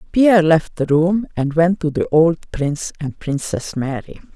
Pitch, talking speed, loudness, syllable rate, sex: 160 Hz, 180 wpm, -17 LUFS, 4.5 syllables/s, female